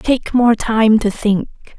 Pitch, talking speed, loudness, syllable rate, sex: 220 Hz, 170 wpm, -15 LUFS, 3.3 syllables/s, female